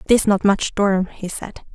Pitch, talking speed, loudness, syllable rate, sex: 200 Hz, 205 wpm, -19 LUFS, 4.2 syllables/s, female